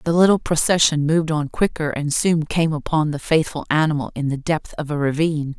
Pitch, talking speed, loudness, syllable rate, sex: 155 Hz, 205 wpm, -20 LUFS, 5.6 syllables/s, female